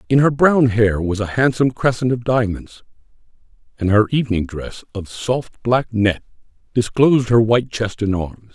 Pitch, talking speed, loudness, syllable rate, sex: 115 Hz, 170 wpm, -18 LUFS, 4.9 syllables/s, male